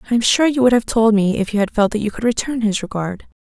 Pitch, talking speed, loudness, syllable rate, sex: 220 Hz, 315 wpm, -17 LUFS, 6.5 syllables/s, female